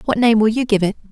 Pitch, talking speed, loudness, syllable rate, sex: 220 Hz, 325 wpm, -16 LUFS, 7.1 syllables/s, female